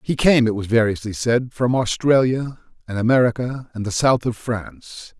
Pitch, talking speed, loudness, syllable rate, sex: 120 Hz, 175 wpm, -19 LUFS, 4.8 syllables/s, male